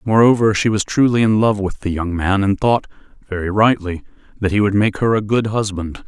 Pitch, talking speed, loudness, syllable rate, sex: 105 Hz, 215 wpm, -17 LUFS, 5.3 syllables/s, male